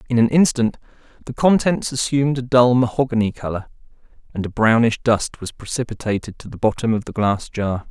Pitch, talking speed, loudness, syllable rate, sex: 115 Hz, 175 wpm, -19 LUFS, 5.6 syllables/s, male